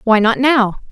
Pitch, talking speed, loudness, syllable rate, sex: 235 Hz, 195 wpm, -13 LUFS, 4.1 syllables/s, female